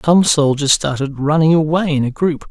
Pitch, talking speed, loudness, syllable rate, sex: 150 Hz, 190 wpm, -15 LUFS, 5.0 syllables/s, male